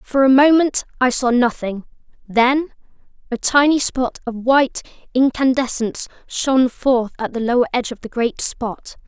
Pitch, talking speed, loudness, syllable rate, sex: 250 Hz, 145 wpm, -18 LUFS, 4.7 syllables/s, female